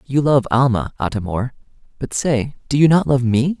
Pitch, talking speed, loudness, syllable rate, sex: 130 Hz, 200 wpm, -18 LUFS, 4.9 syllables/s, male